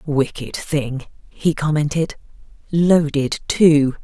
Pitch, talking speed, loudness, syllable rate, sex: 150 Hz, 75 wpm, -19 LUFS, 3.3 syllables/s, female